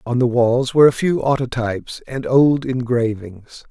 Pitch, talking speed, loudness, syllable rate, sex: 125 Hz, 160 wpm, -17 LUFS, 4.6 syllables/s, male